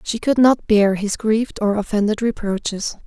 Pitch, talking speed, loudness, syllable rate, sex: 215 Hz, 175 wpm, -19 LUFS, 4.8 syllables/s, female